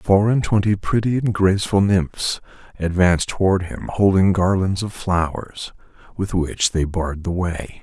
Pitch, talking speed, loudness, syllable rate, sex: 95 Hz, 155 wpm, -19 LUFS, 4.4 syllables/s, male